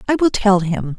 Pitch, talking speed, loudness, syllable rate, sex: 200 Hz, 245 wpm, -16 LUFS, 4.8 syllables/s, female